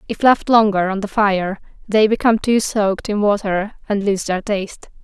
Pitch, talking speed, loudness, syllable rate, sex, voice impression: 205 Hz, 190 wpm, -17 LUFS, 5.1 syllables/s, female, very feminine, young, slightly adult-like, thin, slightly relaxed, slightly powerful, slightly dark, slightly soft, very clear, fluent, very cute, intellectual, very refreshing, sincere, calm, friendly, reassuring, very unique, elegant, very sweet, slightly lively, very kind, slightly sharp, modest, light